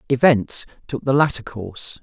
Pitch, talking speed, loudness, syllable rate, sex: 125 Hz, 150 wpm, -20 LUFS, 4.9 syllables/s, male